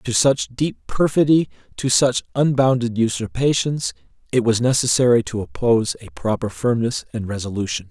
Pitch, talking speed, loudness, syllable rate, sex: 120 Hz, 135 wpm, -20 LUFS, 5.1 syllables/s, male